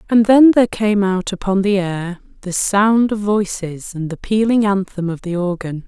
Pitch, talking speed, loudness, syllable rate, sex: 195 Hz, 195 wpm, -16 LUFS, 4.6 syllables/s, female